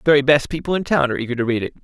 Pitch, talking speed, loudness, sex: 140 Hz, 360 wpm, -19 LUFS, male